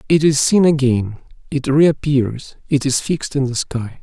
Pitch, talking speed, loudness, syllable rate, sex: 135 Hz, 180 wpm, -17 LUFS, 4.4 syllables/s, male